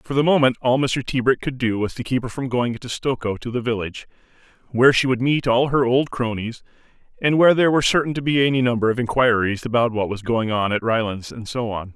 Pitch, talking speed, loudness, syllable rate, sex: 125 Hz, 240 wpm, -20 LUFS, 6.2 syllables/s, male